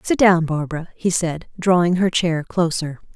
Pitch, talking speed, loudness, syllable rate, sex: 170 Hz, 170 wpm, -19 LUFS, 4.7 syllables/s, female